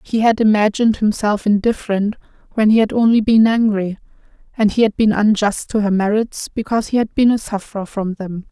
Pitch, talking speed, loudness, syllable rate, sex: 215 Hz, 190 wpm, -16 LUFS, 5.7 syllables/s, female